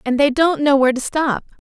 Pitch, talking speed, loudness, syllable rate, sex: 280 Hz, 250 wpm, -17 LUFS, 5.9 syllables/s, female